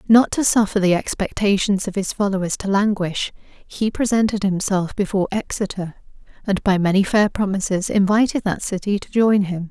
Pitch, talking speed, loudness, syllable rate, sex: 200 Hz, 160 wpm, -19 LUFS, 5.1 syllables/s, female